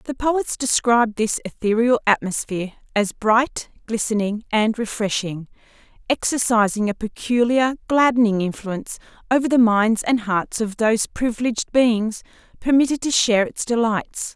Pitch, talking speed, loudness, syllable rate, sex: 225 Hz, 125 wpm, -20 LUFS, 4.8 syllables/s, female